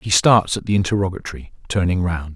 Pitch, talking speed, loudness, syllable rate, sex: 95 Hz, 180 wpm, -19 LUFS, 6.0 syllables/s, male